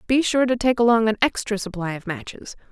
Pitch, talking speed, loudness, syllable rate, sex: 220 Hz, 220 wpm, -21 LUFS, 5.9 syllables/s, female